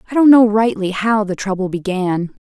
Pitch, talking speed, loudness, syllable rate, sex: 205 Hz, 200 wpm, -15 LUFS, 5.1 syllables/s, female